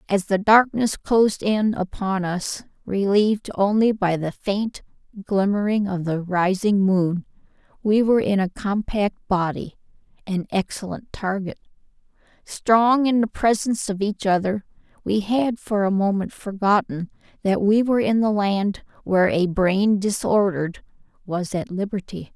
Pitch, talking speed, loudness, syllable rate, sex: 200 Hz, 135 wpm, -21 LUFS, 4.4 syllables/s, female